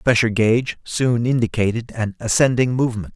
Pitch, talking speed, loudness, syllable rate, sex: 115 Hz, 150 wpm, -19 LUFS, 5.9 syllables/s, male